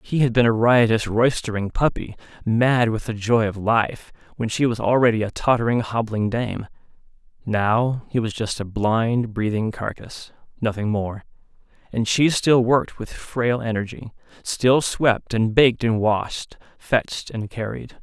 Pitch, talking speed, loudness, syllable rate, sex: 115 Hz, 155 wpm, -21 LUFS, 4.4 syllables/s, male